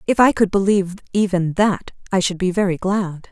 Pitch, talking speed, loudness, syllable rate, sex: 190 Hz, 200 wpm, -19 LUFS, 5.4 syllables/s, female